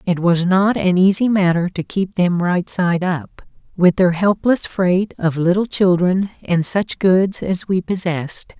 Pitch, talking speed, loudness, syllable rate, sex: 185 Hz, 175 wpm, -17 LUFS, 4.0 syllables/s, female